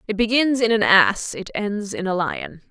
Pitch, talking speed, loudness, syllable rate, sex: 205 Hz, 220 wpm, -19 LUFS, 4.4 syllables/s, female